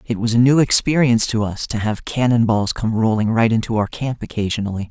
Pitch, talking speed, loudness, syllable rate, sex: 115 Hz, 210 wpm, -18 LUFS, 5.9 syllables/s, male